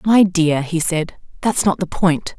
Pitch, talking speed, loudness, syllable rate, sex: 175 Hz, 200 wpm, -18 LUFS, 3.9 syllables/s, female